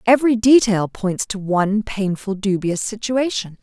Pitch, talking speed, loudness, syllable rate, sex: 210 Hz, 135 wpm, -19 LUFS, 4.6 syllables/s, female